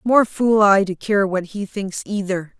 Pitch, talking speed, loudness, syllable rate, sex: 200 Hz, 210 wpm, -19 LUFS, 4.1 syllables/s, female